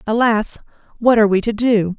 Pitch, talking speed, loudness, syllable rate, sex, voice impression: 220 Hz, 180 wpm, -16 LUFS, 5.6 syllables/s, female, very feminine, adult-like, slightly middle-aged, thin, slightly relaxed, slightly weak, slightly bright, soft, clear, fluent, slightly cute, intellectual, slightly refreshing, slightly sincere, calm, friendly, reassuring, unique, very elegant, sweet, slightly lively, kind